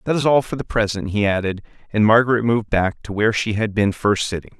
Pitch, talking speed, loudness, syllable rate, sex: 105 Hz, 250 wpm, -19 LUFS, 6.3 syllables/s, male